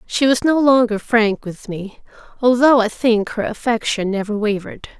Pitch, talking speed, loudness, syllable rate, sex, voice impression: 225 Hz, 170 wpm, -17 LUFS, 4.8 syllables/s, female, very gender-neutral, young, very thin, very tensed, slightly powerful, slightly dark, soft, very clear, very fluent, very cute, very intellectual, very refreshing, sincere, calm, very friendly, very reassuring, very unique, very elegant, slightly wild, very sweet, lively, slightly strict, slightly intense, sharp, slightly modest, very light